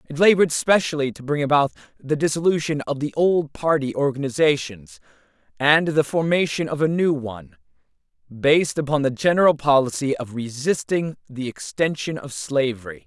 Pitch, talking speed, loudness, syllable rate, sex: 145 Hz, 140 wpm, -21 LUFS, 5.2 syllables/s, male